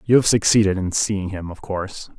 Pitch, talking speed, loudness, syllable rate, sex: 100 Hz, 220 wpm, -19 LUFS, 5.4 syllables/s, male